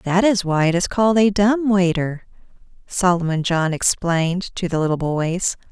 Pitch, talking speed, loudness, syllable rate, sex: 180 Hz, 170 wpm, -19 LUFS, 4.7 syllables/s, female